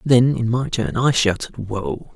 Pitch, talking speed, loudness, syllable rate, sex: 120 Hz, 195 wpm, -20 LUFS, 3.9 syllables/s, male